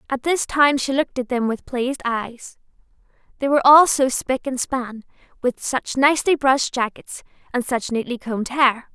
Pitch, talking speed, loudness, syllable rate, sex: 255 Hz, 180 wpm, -20 LUFS, 5.0 syllables/s, female